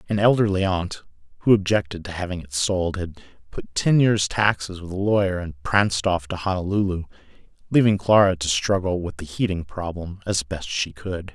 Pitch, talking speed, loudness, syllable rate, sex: 90 Hz, 180 wpm, -22 LUFS, 5.2 syllables/s, male